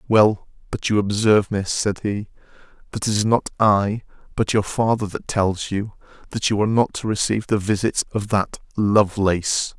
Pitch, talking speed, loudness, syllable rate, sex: 105 Hz, 180 wpm, -21 LUFS, 5.0 syllables/s, male